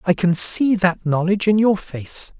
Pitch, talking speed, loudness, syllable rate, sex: 185 Hz, 200 wpm, -18 LUFS, 4.4 syllables/s, male